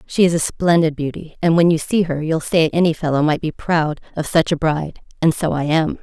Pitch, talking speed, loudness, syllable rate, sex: 160 Hz, 250 wpm, -18 LUFS, 5.5 syllables/s, female